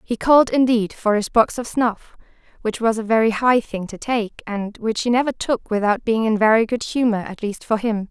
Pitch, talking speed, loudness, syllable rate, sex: 225 Hz, 230 wpm, -19 LUFS, 5.1 syllables/s, female